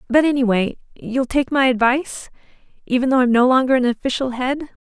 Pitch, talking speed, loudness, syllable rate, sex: 255 Hz, 175 wpm, -18 LUFS, 5.8 syllables/s, female